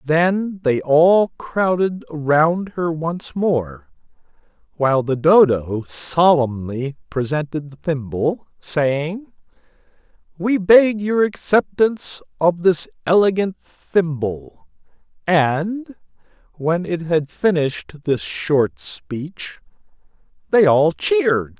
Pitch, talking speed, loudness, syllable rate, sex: 160 Hz, 95 wpm, -18 LUFS, 3.1 syllables/s, male